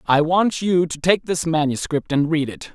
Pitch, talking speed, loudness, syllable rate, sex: 160 Hz, 220 wpm, -20 LUFS, 4.6 syllables/s, male